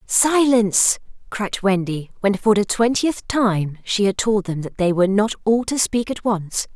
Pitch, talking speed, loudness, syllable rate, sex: 210 Hz, 185 wpm, -19 LUFS, 4.3 syllables/s, female